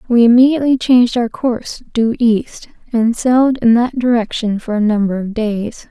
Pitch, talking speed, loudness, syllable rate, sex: 235 Hz, 175 wpm, -14 LUFS, 5.1 syllables/s, female